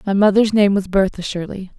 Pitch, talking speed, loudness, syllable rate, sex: 195 Hz, 200 wpm, -17 LUFS, 5.6 syllables/s, female